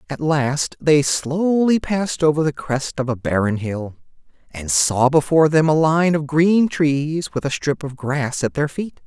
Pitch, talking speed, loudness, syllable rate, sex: 145 Hz, 190 wpm, -19 LUFS, 4.2 syllables/s, male